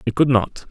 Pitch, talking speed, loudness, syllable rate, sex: 125 Hz, 255 wpm, -18 LUFS, 5.2 syllables/s, male